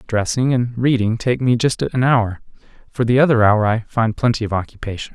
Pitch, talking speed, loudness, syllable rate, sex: 115 Hz, 200 wpm, -18 LUFS, 5.5 syllables/s, male